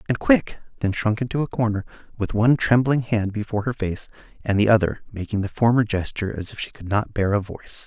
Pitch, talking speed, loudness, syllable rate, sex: 110 Hz, 215 wpm, -22 LUFS, 5.9 syllables/s, male